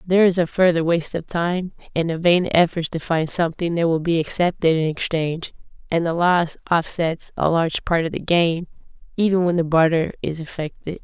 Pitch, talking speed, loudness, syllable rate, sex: 170 Hz, 195 wpm, -20 LUFS, 5.5 syllables/s, female